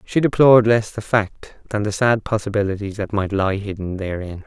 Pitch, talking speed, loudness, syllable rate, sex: 105 Hz, 190 wpm, -19 LUFS, 5.2 syllables/s, male